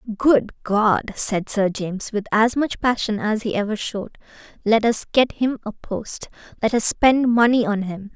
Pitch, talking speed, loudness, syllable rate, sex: 220 Hz, 185 wpm, -20 LUFS, 4.5 syllables/s, female